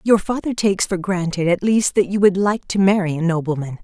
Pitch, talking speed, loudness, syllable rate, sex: 190 Hz, 235 wpm, -18 LUFS, 5.7 syllables/s, female